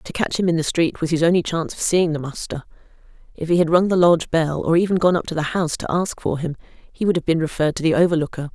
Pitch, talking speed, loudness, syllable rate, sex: 165 Hz, 280 wpm, -20 LUFS, 6.7 syllables/s, female